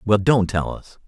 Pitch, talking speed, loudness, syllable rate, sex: 105 Hz, 225 wpm, -20 LUFS, 4.4 syllables/s, male